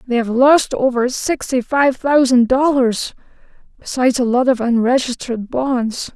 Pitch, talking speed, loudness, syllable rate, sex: 255 Hz, 135 wpm, -16 LUFS, 4.5 syllables/s, female